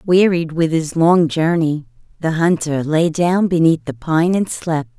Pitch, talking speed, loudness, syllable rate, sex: 160 Hz, 170 wpm, -17 LUFS, 4.1 syllables/s, female